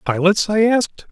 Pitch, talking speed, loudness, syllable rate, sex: 200 Hz, 160 wpm, -16 LUFS, 5.0 syllables/s, male